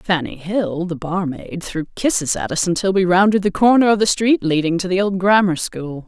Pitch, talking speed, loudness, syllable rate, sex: 185 Hz, 215 wpm, -18 LUFS, 5.1 syllables/s, female